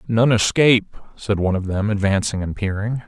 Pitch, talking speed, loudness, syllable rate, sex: 105 Hz, 175 wpm, -19 LUFS, 5.4 syllables/s, male